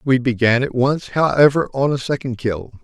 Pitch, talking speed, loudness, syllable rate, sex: 130 Hz, 190 wpm, -18 LUFS, 4.9 syllables/s, male